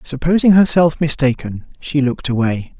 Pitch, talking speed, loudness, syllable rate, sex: 145 Hz, 130 wpm, -15 LUFS, 5.1 syllables/s, male